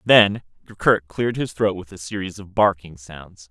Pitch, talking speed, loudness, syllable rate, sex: 95 Hz, 190 wpm, -21 LUFS, 4.7 syllables/s, male